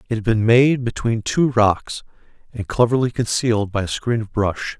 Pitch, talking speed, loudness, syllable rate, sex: 115 Hz, 190 wpm, -19 LUFS, 4.9 syllables/s, male